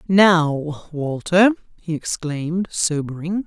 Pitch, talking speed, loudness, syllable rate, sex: 165 Hz, 85 wpm, -20 LUFS, 3.4 syllables/s, female